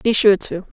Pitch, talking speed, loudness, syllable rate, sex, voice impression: 200 Hz, 230 wpm, -16 LUFS, 4.6 syllables/s, female, very feminine, very young, very thin, slightly tensed, slightly relaxed, slightly powerful, slightly weak, dark, hard, clear, slightly fluent, cute, very intellectual, refreshing, sincere, very calm, friendly, reassuring, very unique, slightly elegant, sweet, slightly lively, kind, very strict, very intense, very sharp, very modest, light